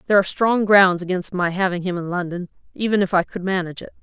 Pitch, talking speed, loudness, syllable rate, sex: 185 Hz, 240 wpm, -20 LUFS, 6.8 syllables/s, female